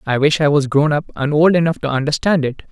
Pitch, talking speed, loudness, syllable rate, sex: 150 Hz, 265 wpm, -16 LUFS, 6.0 syllables/s, male